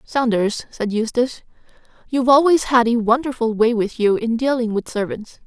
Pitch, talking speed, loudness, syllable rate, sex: 235 Hz, 165 wpm, -18 LUFS, 5.2 syllables/s, female